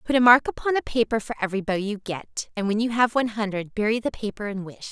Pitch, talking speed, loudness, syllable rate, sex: 215 Hz, 270 wpm, -24 LUFS, 6.6 syllables/s, female